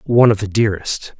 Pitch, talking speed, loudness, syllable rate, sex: 105 Hz, 200 wpm, -16 LUFS, 6.4 syllables/s, male